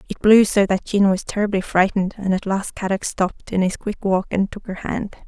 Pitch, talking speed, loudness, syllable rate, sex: 195 Hz, 240 wpm, -20 LUFS, 5.5 syllables/s, female